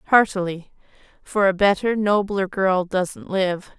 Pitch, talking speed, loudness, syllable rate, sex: 195 Hz, 125 wpm, -21 LUFS, 3.7 syllables/s, female